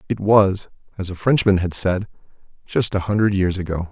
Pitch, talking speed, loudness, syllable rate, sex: 95 Hz, 185 wpm, -19 LUFS, 5.2 syllables/s, male